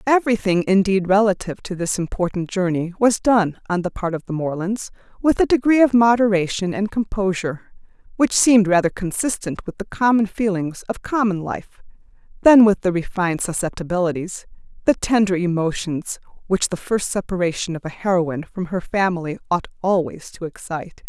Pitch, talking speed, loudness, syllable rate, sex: 190 Hz, 155 wpm, -20 LUFS, 5.4 syllables/s, female